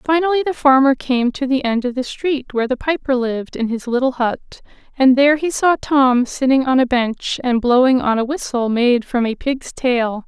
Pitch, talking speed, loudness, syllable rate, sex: 260 Hz, 215 wpm, -17 LUFS, 5.1 syllables/s, female